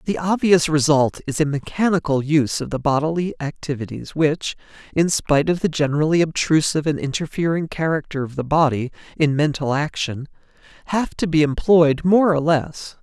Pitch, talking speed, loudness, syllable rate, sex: 155 Hz, 155 wpm, -20 LUFS, 3.4 syllables/s, male